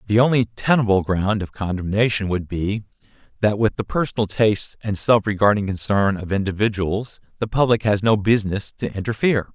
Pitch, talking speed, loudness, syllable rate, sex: 105 Hz, 165 wpm, -20 LUFS, 5.5 syllables/s, male